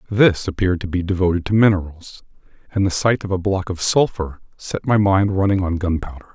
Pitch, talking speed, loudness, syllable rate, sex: 95 Hz, 200 wpm, -19 LUFS, 5.7 syllables/s, male